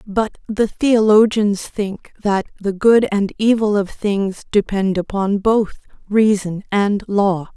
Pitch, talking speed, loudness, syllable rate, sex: 205 Hz, 135 wpm, -17 LUFS, 3.6 syllables/s, female